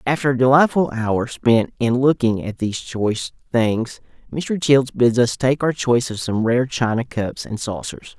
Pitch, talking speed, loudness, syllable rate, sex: 125 Hz, 185 wpm, -19 LUFS, 4.5 syllables/s, male